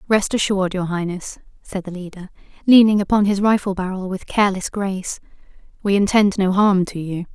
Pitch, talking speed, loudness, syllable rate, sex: 195 Hz, 170 wpm, -19 LUFS, 5.6 syllables/s, female